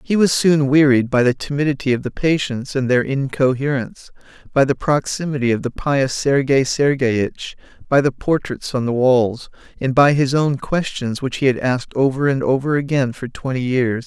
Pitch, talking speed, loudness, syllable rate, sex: 135 Hz, 185 wpm, -18 LUFS, 4.9 syllables/s, male